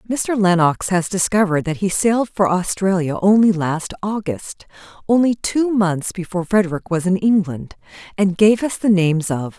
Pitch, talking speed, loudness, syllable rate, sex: 190 Hz, 165 wpm, -18 LUFS, 5.0 syllables/s, female